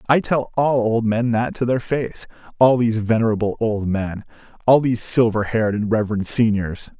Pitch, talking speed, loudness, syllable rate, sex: 115 Hz, 180 wpm, -19 LUFS, 5.2 syllables/s, male